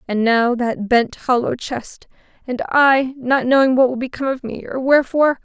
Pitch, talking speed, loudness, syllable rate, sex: 255 Hz, 190 wpm, -17 LUFS, 5.0 syllables/s, female